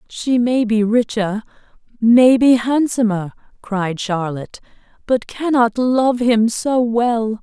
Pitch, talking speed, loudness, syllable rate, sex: 230 Hz, 120 wpm, -16 LUFS, 3.5 syllables/s, female